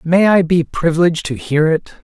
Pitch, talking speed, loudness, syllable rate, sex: 165 Hz, 200 wpm, -15 LUFS, 5.2 syllables/s, male